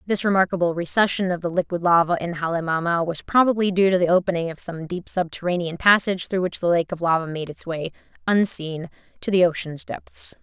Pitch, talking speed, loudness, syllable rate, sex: 175 Hz, 195 wpm, -22 LUFS, 5.8 syllables/s, female